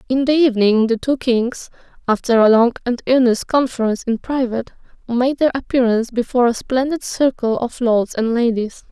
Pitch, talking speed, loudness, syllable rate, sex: 245 Hz, 170 wpm, -17 LUFS, 5.5 syllables/s, female